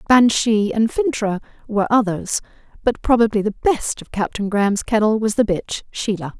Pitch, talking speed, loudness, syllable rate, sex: 215 Hz, 160 wpm, -19 LUFS, 5.0 syllables/s, female